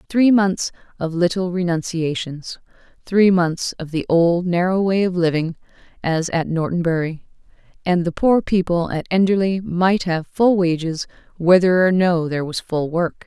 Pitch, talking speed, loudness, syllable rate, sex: 175 Hz, 150 wpm, -19 LUFS, 4.5 syllables/s, female